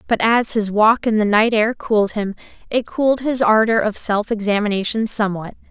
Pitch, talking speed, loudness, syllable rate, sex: 215 Hz, 190 wpm, -18 LUFS, 5.4 syllables/s, female